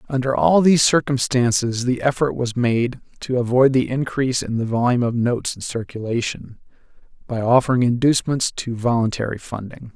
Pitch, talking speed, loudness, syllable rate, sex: 125 Hz, 150 wpm, -19 LUFS, 5.5 syllables/s, male